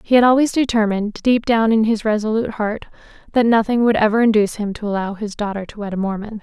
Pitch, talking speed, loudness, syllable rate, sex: 215 Hz, 225 wpm, -18 LUFS, 6.5 syllables/s, female